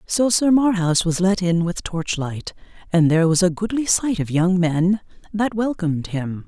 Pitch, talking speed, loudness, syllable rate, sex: 180 Hz, 185 wpm, -20 LUFS, 4.6 syllables/s, female